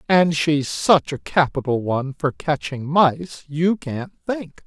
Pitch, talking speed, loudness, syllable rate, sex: 150 Hz, 155 wpm, -21 LUFS, 3.6 syllables/s, male